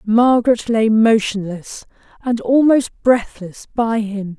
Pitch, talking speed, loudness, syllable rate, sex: 225 Hz, 110 wpm, -16 LUFS, 3.6 syllables/s, female